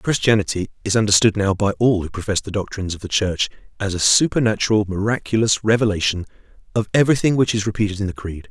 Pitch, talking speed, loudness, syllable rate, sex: 105 Hz, 185 wpm, -19 LUFS, 6.6 syllables/s, male